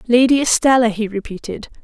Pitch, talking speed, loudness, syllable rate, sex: 235 Hz, 130 wpm, -15 LUFS, 5.8 syllables/s, female